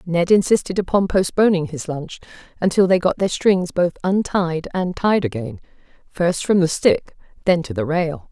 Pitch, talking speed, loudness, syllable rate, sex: 175 Hz, 165 wpm, -19 LUFS, 4.6 syllables/s, female